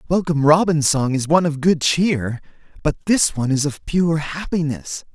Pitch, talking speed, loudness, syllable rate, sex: 155 Hz, 175 wpm, -19 LUFS, 5.0 syllables/s, male